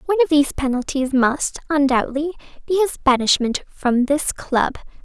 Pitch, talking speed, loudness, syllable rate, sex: 285 Hz, 145 wpm, -19 LUFS, 5.3 syllables/s, female